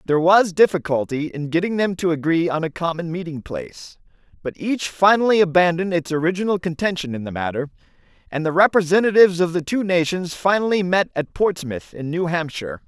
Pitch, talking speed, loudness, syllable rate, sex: 170 Hz, 170 wpm, -20 LUFS, 5.8 syllables/s, male